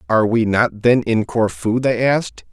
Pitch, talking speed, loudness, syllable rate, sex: 115 Hz, 190 wpm, -17 LUFS, 4.8 syllables/s, male